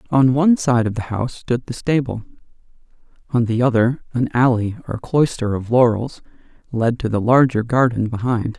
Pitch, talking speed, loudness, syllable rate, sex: 120 Hz, 170 wpm, -18 LUFS, 5.2 syllables/s, male